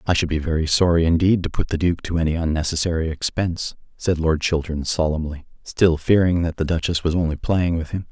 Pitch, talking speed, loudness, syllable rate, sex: 80 Hz, 200 wpm, -21 LUFS, 5.8 syllables/s, male